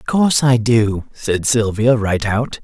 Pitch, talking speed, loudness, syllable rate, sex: 115 Hz, 180 wpm, -16 LUFS, 4.0 syllables/s, male